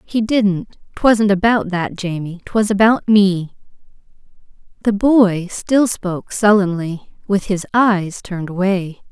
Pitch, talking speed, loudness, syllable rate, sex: 195 Hz, 125 wpm, -16 LUFS, 3.8 syllables/s, female